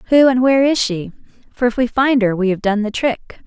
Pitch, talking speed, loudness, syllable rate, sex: 235 Hz, 260 wpm, -16 LUFS, 5.7 syllables/s, female